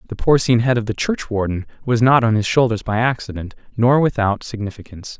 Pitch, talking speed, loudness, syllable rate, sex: 115 Hz, 185 wpm, -18 LUFS, 6.1 syllables/s, male